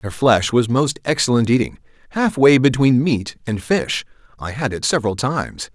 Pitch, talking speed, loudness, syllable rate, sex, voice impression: 125 Hz, 155 wpm, -18 LUFS, 4.9 syllables/s, male, masculine, middle-aged, thick, slightly powerful, fluent, slightly raspy, slightly cool, slightly mature, slightly friendly, unique, wild, lively, kind, slightly strict, slightly sharp